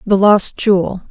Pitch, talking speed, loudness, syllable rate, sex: 195 Hz, 160 wpm, -13 LUFS, 4.2 syllables/s, female